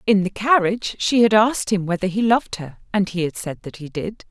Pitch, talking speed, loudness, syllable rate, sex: 200 Hz, 250 wpm, -20 LUFS, 5.7 syllables/s, female